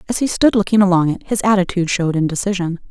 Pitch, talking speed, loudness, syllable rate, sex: 190 Hz, 205 wpm, -16 LUFS, 7.2 syllables/s, female